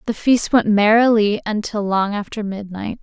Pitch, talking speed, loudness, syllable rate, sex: 210 Hz, 160 wpm, -18 LUFS, 4.6 syllables/s, female